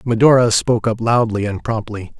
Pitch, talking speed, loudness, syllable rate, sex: 115 Hz, 165 wpm, -16 LUFS, 5.4 syllables/s, male